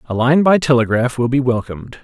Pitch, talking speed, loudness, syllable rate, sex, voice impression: 130 Hz, 205 wpm, -15 LUFS, 5.8 syllables/s, male, very masculine, very adult-like, slightly old, very thick, tensed, powerful, bright, slightly soft, muffled, slightly fluent, slightly raspy, cool, very intellectual, very sincere, very calm, very mature, friendly, reassuring, slightly unique, slightly elegant, wild, sweet, slightly lively, very kind, modest